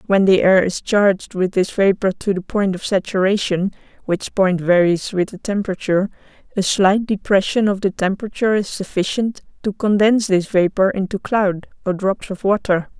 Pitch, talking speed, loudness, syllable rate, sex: 195 Hz, 170 wpm, -18 LUFS, 4.5 syllables/s, female